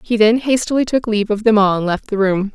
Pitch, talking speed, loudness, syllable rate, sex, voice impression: 215 Hz, 280 wpm, -16 LUFS, 6.1 syllables/s, female, feminine, adult-like, sincere, slightly calm, elegant, slightly sweet